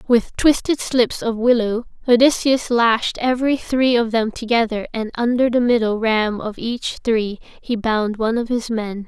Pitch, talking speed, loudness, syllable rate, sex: 230 Hz, 170 wpm, -19 LUFS, 4.4 syllables/s, female